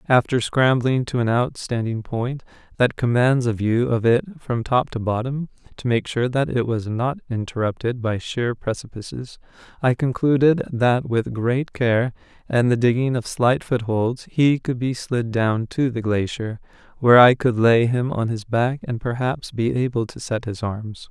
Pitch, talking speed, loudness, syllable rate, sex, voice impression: 120 Hz, 180 wpm, -21 LUFS, 4.4 syllables/s, male, masculine, adult-like, slightly weak, slightly dark, slightly halting, cool, slightly refreshing, friendly, lively, kind, modest